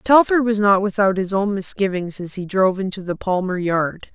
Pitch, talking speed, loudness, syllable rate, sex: 195 Hz, 205 wpm, -19 LUFS, 5.1 syllables/s, female